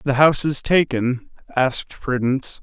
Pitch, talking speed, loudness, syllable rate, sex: 135 Hz, 135 wpm, -20 LUFS, 4.9 syllables/s, male